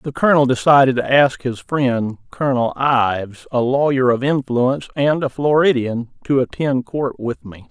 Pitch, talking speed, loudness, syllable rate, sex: 130 Hz, 165 wpm, -17 LUFS, 4.5 syllables/s, male